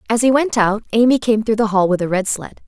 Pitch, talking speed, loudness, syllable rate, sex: 220 Hz, 290 wpm, -16 LUFS, 5.9 syllables/s, female